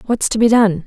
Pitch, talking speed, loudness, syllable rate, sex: 215 Hz, 275 wpm, -14 LUFS, 5.6 syllables/s, female